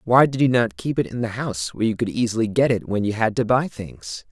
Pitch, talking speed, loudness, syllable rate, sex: 110 Hz, 290 wpm, -21 LUFS, 6.0 syllables/s, male